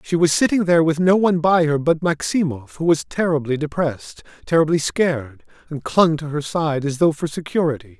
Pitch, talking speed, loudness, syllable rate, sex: 155 Hz, 195 wpm, -19 LUFS, 5.5 syllables/s, male